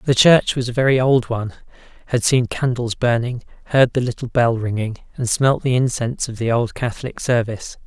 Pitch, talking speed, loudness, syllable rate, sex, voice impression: 120 Hz, 185 wpm, -19 LUFS, 5.6 syllables/s, male, masculine, slightly young, slightly adult-like, slightly thick, relaxed, slightly weak, slightly dark, soft, slightly muffled, fluent, slightly cool, intellectual, slightly sincere, very calm, slightly friendly, slightly unique, slightly elegant, slightly sweet, very kind, modest